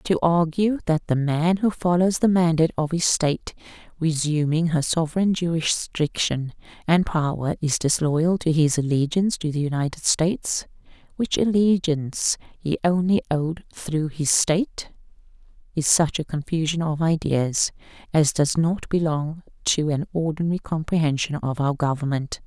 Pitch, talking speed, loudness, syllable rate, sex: 160 Hz, 140 wpm, -22 LUFS, 4.7 syllables/s, female